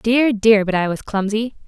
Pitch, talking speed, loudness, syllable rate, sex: 215 Hz, 215 wpm, -17 LUFS, 4.6 syllables/s, female